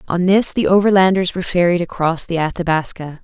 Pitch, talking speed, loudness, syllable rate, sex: 175 Hz, 165 wpm, -16 LUFS, 5.8 syllables/s, female